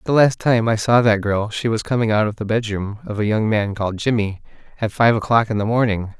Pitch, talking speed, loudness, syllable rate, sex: 110 Hz, 250 wpm, -19 LUFS, 5.7 syllables/s, male